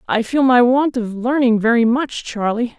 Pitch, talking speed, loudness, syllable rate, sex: 240 Hz, 195 wpm, -16 LUFS, 4.6 syllables/s, female